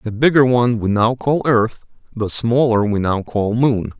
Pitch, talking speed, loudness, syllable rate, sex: 115 Hz, 195 wpm, -17 LUFS, 4.7 syllables/s, male